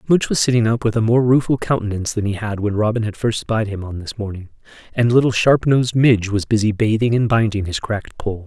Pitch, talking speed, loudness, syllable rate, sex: 110 Hz, 240 wpm, -18 LUFS, 6.1 syllables/s, male